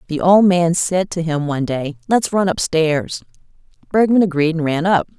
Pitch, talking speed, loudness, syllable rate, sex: 170 Hz, 195 wpm, -17 LUFS, 4.9 syllables/s, female